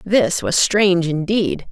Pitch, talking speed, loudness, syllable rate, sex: 185 Hz, 140 wpm, -17 LUFS, 3.7 syllables/s, female